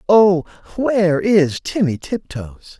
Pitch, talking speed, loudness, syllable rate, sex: 180 Hz, 105 wpm, -17 LUFS, 3.5 syllables/s, male